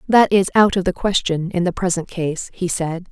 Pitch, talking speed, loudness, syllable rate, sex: 180 Hz, 230 wpm, -18 LUFS, 5.0 syllables/s, female